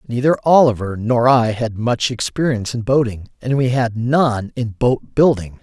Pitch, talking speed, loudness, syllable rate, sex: 120 Hz, 170 wpm, -17 LUFS, 4.6 syllables/s, male